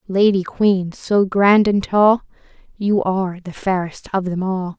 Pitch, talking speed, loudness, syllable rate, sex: 195 Hz, 165 wpm, -18 LUFS, 4.0 syllables/s, female